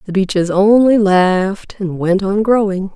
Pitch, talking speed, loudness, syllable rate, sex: 195 Hz, 165 wpm, -14 LUFS, 4.3 syllables/s, female